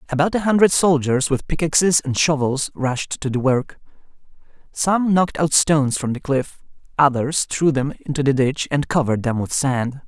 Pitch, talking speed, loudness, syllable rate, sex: 145 Hz, 180 wpm, -19 LUFS, 5.0 syllables/s, male